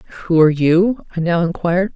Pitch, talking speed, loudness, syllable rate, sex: 175 Hz, 185 wpm, -16 LUFS, 7.0 syllables/s, female